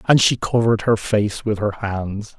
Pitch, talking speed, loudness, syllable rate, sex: 105 Hz, 200 wpm, -19 LUFS, 4.4 syllables/s, male